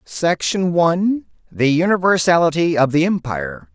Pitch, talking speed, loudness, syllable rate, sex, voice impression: 160 Hz, 110 wpm, -17 LUFS, 4.7 syllables/s, male, very masculine, slightly middle-aged, very thick, very tensed, powerful, bright, slightly soft, muffled, fluent, cool, very intellectual, refreshing, sincere, calm, slightly mature, very friendly, very reassuring, very unique, slightly elegant, wild, sweet, lively, kind, slightly intense, slightly light